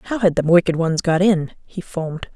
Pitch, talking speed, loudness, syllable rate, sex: 175 Hz, 230 wpm, -18 LUFS, 5.1 syllables/s, female